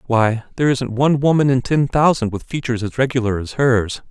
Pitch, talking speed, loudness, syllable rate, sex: 125 Hz, 205 wpm, -18 LUFS, 5.9 syllables/s, male